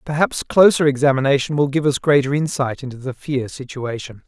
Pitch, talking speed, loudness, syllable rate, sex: 140 Hz, 170 wpm, -18 LUFS, 5.5 syllables/s, male